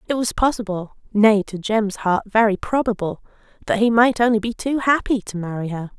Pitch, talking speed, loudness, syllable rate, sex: 215 Hz, 190 wpm, -20 LUFS, 5.3 syllables/s, female